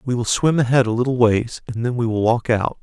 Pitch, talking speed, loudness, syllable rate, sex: 120 Hz, 275 wpm, -19 LUFS, 5.8 syllables/s, male